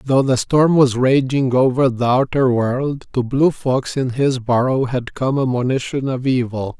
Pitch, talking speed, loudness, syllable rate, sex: 130 Hz, 185 wpm, -17 LUFS, 4.3 syllables/s, male